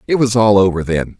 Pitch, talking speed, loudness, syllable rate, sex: 105 Hz, 250 wpm, -14 LUFS, 5.8 syllables/s, male